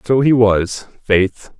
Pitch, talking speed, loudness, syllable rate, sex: 110 Hz, 150 wpm, -15 LUFS, 2.8 syllables/s, male